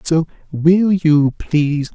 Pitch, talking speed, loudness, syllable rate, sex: 160 Hz, 125 wpm, -15 LUFS, 3.2 syllables/s, male